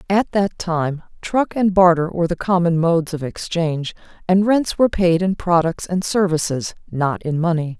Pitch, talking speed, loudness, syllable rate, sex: 175 Hz, 175 wpm, -19 LUFS, 4.9 syllables/s, female